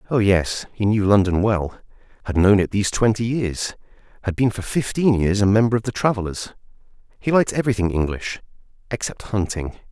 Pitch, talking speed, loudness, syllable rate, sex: 105 Hz, 170 wpm, -20 LUFS, 5.7 syllables/s, male